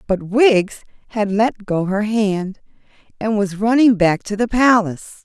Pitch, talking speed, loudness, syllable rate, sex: 210 Hz, 160 wpm, -17 LUFS, 4.2 syllables/s, female